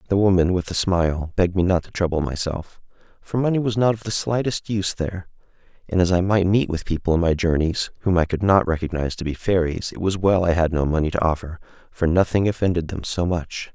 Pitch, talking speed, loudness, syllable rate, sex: 90 Hz, 230 wpm, -21 LUFS, 6.1 syllables/s, male